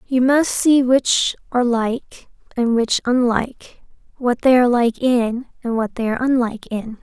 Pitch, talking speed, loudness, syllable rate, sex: 245 Hz, 170 wpm, -18 LUFS, 4.7 syllables/s, female